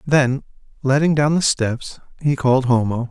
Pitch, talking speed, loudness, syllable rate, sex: 135 Hz, 155 wpm, -19 LUFS, 4.6 syllables/s, male